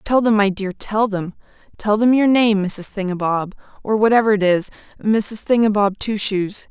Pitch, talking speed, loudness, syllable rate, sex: 210 Hz, 170 wpm, -18 LUFS, 4.7 syllables/s, female